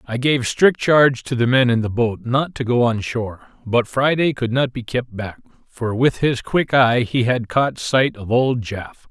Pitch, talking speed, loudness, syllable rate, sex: 120 Hz, 235 wpm, -18 LUFS, 4.5 syllables/s, male